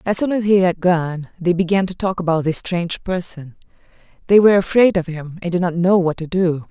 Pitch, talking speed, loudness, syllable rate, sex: 175 Hz, 235 wpm, -17 LUFS, 5.6 syllables/s, female